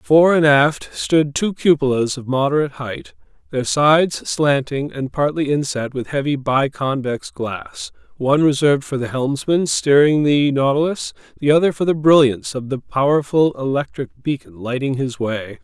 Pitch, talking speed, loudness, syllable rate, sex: 140 Hz, 155 wpm, -18 LUFS, 4.6 syllables/s, male